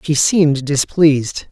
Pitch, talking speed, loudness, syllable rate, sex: 150 Hz, 120 wpm, -14 LUFS, 4.4 syllables/s, male